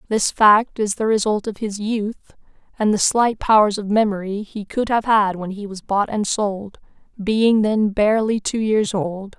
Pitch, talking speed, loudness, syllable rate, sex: 210 Hz, 190 wpm, -19 LUFS, 4.3 syllables/s, female